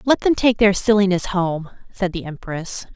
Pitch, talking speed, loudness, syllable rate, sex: 195 Hz, 185 wpm, -19 LUFS, 4.6 syllables/s, female